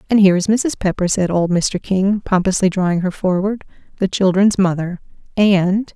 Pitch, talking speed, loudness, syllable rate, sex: 190 Hz, 170 wpm, -17 LUFS, 5.0 syllables/s, female